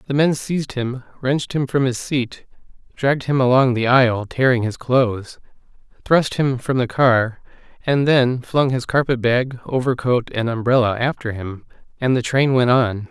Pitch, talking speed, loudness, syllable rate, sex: 125 Hz, 175 wpm, -19 LUFS, 4.7 syllables/s, male